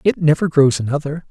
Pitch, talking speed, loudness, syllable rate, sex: 150 Hz, 185 wpm, -16 LUFS, 5.9 syllables/s, male